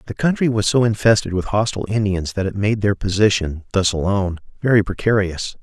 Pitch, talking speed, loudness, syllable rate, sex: 100 Hz, 180 wpm, -19 LUFS, 5.8 syllables/s, male